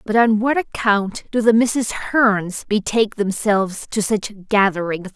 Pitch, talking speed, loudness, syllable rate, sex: 210 Hz, 150 wpm, -18 LUFS, 4.2 syllables/s, female